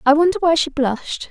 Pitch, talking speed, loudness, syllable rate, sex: 310 Hz, 230 wpm, -18 LUFS, 6.0 syllables/s, female